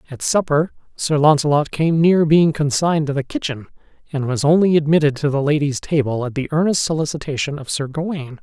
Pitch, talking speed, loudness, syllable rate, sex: 150 Hz, 185 wpm, -18 LUFS, 5.7 syllables/s, male